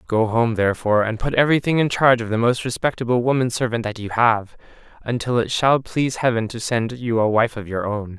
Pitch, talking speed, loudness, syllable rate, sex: 115 Hz, 220 wpm, -20 LUFS, 5.9 syllables/s, male